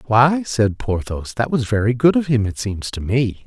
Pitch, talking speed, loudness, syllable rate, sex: 120 Hz, 225 wpm, -19 LUFS, 4.5 syllables/s, male